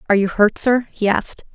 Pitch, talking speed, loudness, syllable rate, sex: 215 Hz, 235 wpm, -17 LUFS, 6.4 syllables/s, female